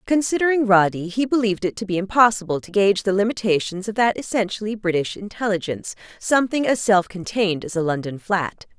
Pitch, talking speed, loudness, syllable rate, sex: 200 Hz, 155 wpm, -21 LUFS, 6.1 syllables/s, female